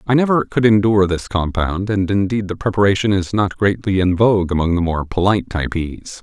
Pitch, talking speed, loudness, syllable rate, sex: 100 Hz, 195 wpm, -17 LUFS, 5.6 syllables/s, male